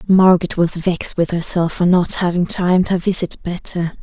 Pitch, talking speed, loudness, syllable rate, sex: 175 Hz, 180 wpm, -17 LUFS, 5.2 syllables/s, female